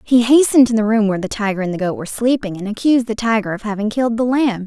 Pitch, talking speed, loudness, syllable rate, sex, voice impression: 220 Hz, 285 wpm, -17 LUFS, 7.2 syllables/s, female, very feminine, slightly young, slightly tensed, slightly cute, slightly unique, lively